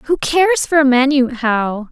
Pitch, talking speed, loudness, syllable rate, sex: 260 Hz, 155 wpm, -14 LUFS, 4.3 syllables/s, female